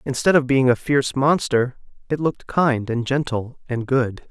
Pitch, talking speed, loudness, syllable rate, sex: 130 Hz, 180 wpm, -20 LUFS, 4.7 syllables/s, male